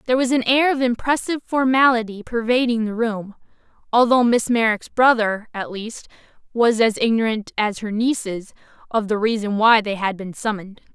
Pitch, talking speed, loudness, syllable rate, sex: 230 Hz, 165 wpm, -19 LUFS, 5.2 syllables/s, female